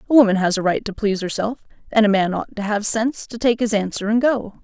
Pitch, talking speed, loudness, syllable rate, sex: 215 Hz, 270 wpm, -20 LUFS, 6.3 syllables/s, female